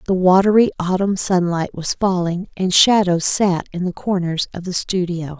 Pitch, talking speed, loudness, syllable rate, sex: 185 Hz, 165 wpm, -17 LUFS, 4.7 syllables/s, female